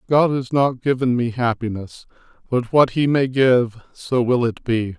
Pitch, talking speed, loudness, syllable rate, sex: 125 Hz, 180 wpm, -19 LUFS, 4.3 syllables/s, male